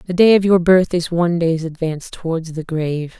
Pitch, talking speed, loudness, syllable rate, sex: 170 Hz, 225 wpm, -17 LUFS, 5.6 syllables/s, female